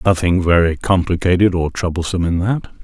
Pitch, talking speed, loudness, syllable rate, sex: 90 Hz, 150 wpm, -16 LUFS, 5.7 syllables/s, male